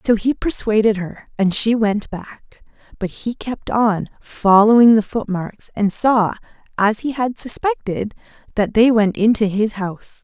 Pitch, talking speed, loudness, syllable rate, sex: 215 Hz, 145 wpm, -17 LUFS, 4.2 syllables/s, female